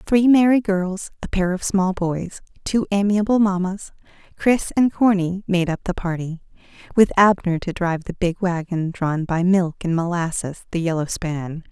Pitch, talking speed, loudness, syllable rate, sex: 185 Hz, 170 wpm, -20 LUFS, 4.5 syllables/s, female